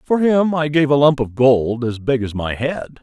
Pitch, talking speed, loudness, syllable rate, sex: 135 Hz, 260 wpm, -17 LUFS, 4.7 syllables/s, male